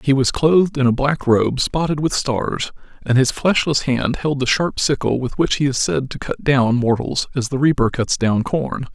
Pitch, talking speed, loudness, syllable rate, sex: 135 Hz, 220 wpm, -18 LUFS, 4.6 syllables/s, male